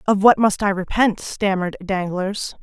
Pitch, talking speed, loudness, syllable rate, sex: 195 Hz, 160 wpm, -19 LUFS, 4.6 syllables/s, female